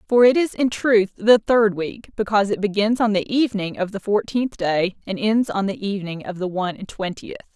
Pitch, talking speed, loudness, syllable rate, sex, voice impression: 205 Hz, 220 wpm, -20 LUFS, 5.4 syllables/s, female, very feminine, very adult-like, thin, tensed, powerful, very bright, hard, very clear, fluent, slightly cute, cool, very intellectual, very refreshing, very sincere, slightly calm, friendly, reassuring, very unique, very elegant, wild, sweet, lively, strict, slightly intense, slightly sharp, slightly light